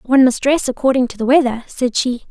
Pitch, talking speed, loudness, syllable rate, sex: 255 Hz, 235 wpm, -16 LUFS, 6.0 syllables/s, female